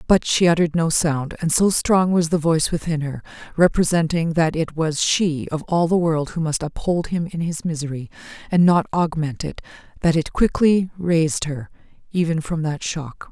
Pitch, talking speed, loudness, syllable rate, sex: 165 Hz, 190 wpm, -20 LUFS, 4.9 syllables/s, female